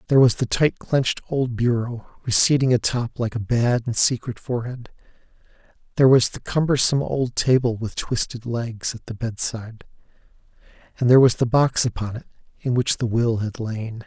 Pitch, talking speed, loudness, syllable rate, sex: 120 Hz, 175 wpm, -21 LUFS, 5.2 syllables/s, male